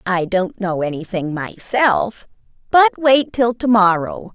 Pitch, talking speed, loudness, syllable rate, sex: 210 Hz, 140 wpm, -17 LUFS, 3.8 syllables/s, female